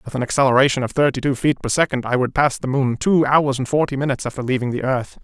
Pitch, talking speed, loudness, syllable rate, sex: 135 Hz, 265 wpm, -19 LUFS, 6.7 syllables/s, male